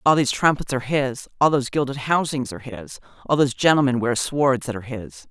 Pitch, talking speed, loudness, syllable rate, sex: 135 Hz, 215 wpm, -21 LUFS, 6.3 syllables/s, female